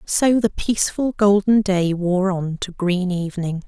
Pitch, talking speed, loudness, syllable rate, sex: 190 Hz, 165 wpm, -19 LUFS, 4.2 syllables/s, female